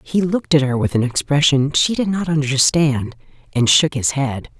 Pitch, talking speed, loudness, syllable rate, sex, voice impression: 145 Hz, 195 wpm, -17 LUFS, 4.9 syllables/s, female, slightly masculine, slightly feminine, very gender-neutral, adult-like, slightly middle-aged, slightly thick, tensed, slightly powerful, bright, slightly soft, slightly muffled, fluent, slightly raspy, cool, intellectual, slightly refreshing, slightly sincere, very calm, very friendly, reassuring, very unique, slightly wild, lively, kind